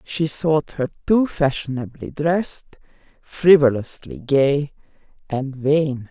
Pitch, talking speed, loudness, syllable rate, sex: 145 Hz, 100 wpm, -20 LUFS, 3.6 syllables/s, female